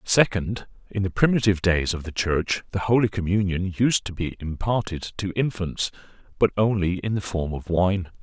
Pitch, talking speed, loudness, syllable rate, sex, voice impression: 95 Hz, 170 wpm, -24 LUFS, 4.9 syllables/s, male, very masculine, adult-like, slightly thick, cool, slightly wild